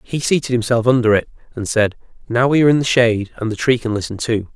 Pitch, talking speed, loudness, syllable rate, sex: 120 Hz, 250 wpm, -17 LUFS, 6.6 syllables/s, male